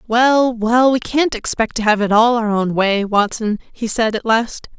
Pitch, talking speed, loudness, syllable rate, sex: 225 Hz, 215 wpm, -16 LUFS, 4.3 syllables/s, female